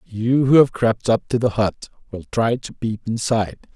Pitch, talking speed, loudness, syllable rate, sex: 115 Hz, 210 wpm, -19 LUFS, 4.6 syllables/s, male